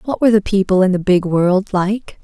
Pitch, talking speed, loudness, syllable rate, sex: 195 Hz, 240 wpm, -15 LUFS, 5.2 syllables/s, female